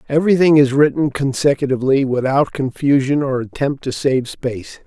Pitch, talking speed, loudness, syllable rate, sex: 135 Hz, 135 wpm, -16 LUFS, 5.4 syllables/s, male